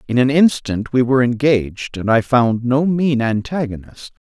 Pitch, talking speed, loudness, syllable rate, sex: 125 Hz, 170 wpm, -17 LUFS, 4.8 syllables/s, male